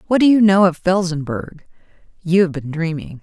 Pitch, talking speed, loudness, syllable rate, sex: 175 Hz, 185 wpm, -17 LUFS, 5.2 syllables/s, female